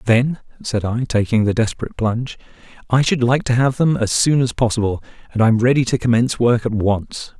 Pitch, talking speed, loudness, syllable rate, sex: 120 Hz, 210 wpm, -18 LUFS, 5.9 syllables/s, male